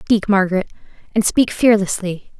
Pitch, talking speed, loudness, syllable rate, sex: 200 Hz, 125 wpm, -17 LUFS, 5.5 syllables/s, female